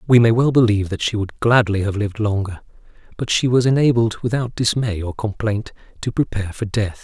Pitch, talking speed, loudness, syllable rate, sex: 110 Hz, 195 wpm, -19 LUFS, 5.8 syllables/s, male